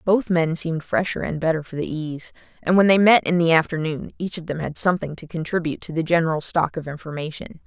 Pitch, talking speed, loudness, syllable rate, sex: 165 Hz, 225 wpm, -22 LUFS, 6.3 syllables/s, female